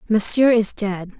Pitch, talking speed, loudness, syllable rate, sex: 210 Hz, 150 wpm, -17 LUFS, 4.2 syllables/s, female